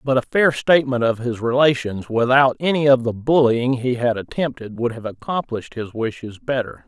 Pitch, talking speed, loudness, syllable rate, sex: 125 Hz, 185 wpm, -19 LUFS, 5.2 syllables/s, male